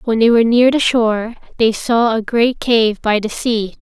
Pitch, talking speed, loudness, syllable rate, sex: 230 Hz, 220 wpm, -15 LUFS, 4.7 syllables/s, female